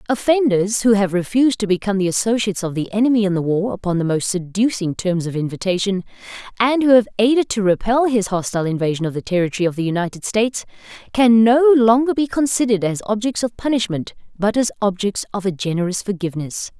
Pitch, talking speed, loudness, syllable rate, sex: 205 Hz, 190 wpm, -18 LUFS, 6.3 syllables/s, female